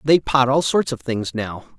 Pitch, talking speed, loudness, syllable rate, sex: 130 Hz, 235 wpm, -20 LUFS, 4.2 syllables/s, male